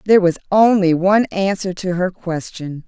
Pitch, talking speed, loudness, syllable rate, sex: 185 Hz, 165 wpm, -17 LUFS, 5.0 syllables/s, female